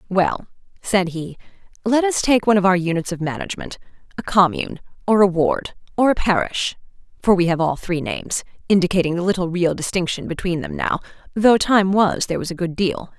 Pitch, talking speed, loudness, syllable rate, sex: 185 Hz, 185 wpm, -19 LUFS, 2.9 syllables/s, female